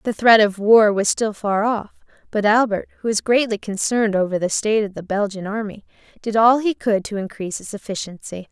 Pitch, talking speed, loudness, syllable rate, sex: 210 Hz, 205 wpm, -19 LUFS, 5.6 syllables/s, female